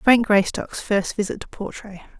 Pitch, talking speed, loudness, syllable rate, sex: 210 Hz, 165 wpm, -22 LUFS, 4.6 syllables/s, female